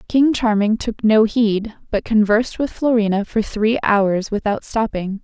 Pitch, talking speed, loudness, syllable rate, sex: 215 Hz, 160 wpm, -18 LUFS, 4.3 syllables/s, female